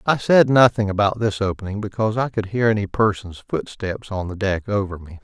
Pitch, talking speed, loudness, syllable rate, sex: 105 Hz, 205 wpm, -20 LUFS, 5.5 syllables/s, male